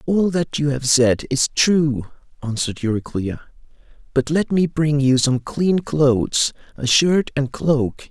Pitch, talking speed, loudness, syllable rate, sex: 140 Hz, 150 wpm, -19 LUFS, 4.0 syllables/s, male